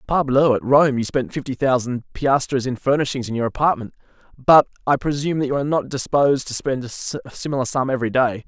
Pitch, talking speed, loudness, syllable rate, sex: 130 Hz, 190 wpm, -20 LUFS, 5.7 syllables/s, male